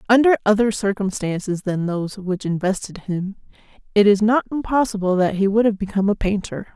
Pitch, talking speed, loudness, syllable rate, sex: 200 Hz, 170 wpm, -20 LUFS, 5.7 syllables/s, female